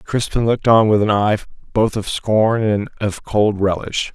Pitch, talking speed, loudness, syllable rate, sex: 105 Hz, 190 wpm, -17 LUFS, 4.4 syllables/s, male